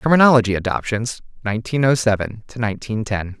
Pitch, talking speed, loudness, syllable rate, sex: 115 Hz, 140 wpm, -19 LUFS, 6.1 syllables/s, male